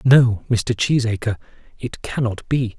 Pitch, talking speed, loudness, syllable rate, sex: 115 Hz, 130 wpm, -20 LUFS, 4.1 syllables/s, male